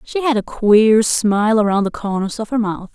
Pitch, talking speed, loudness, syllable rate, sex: 215 Hz, 225 wpm, -16 LUFS, 4.9 syllables/s, female